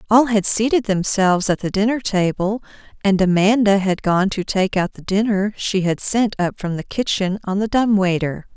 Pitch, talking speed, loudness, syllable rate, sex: 200 Hz, 195 wpm, -18 LUFS, 4.9 syllables/s, female